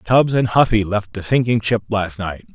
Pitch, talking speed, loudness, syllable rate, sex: 110 Hz, 210 wpm, -18 LUFS, 4.8 syllables/s, male